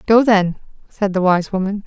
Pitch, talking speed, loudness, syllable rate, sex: 200 Hz, 195 wpm, -17 LUFS, 4.8 syllables/s, female